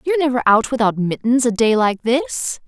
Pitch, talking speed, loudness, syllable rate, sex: 240 Hz, 200 wpm, -17 LUFS, 5.2 syllables/s, female